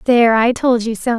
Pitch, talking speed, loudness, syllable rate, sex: 235 Hz, 255 wpm, -14 LUFS, 5.5 syllables/s, female